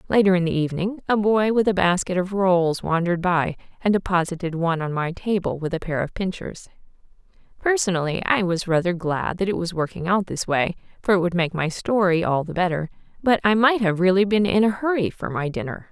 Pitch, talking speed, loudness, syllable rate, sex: 185 Hz, 215 wpm, -22 LUFS, 5.7 syllables/s, female